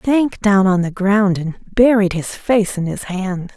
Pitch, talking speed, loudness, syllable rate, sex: 195 Hz, 220 wpm, -17 LUFS, 4.3 syllables/s, female